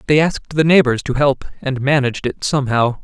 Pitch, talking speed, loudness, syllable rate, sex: 140 Hz, 200 wpm, -16 LUFS, 5.9 syllables/s, male